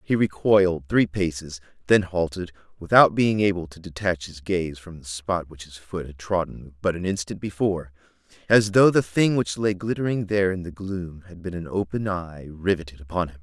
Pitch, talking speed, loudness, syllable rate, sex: 90 Hz, 195 wpm, -23 LUFS, 5.1 syllables/s, male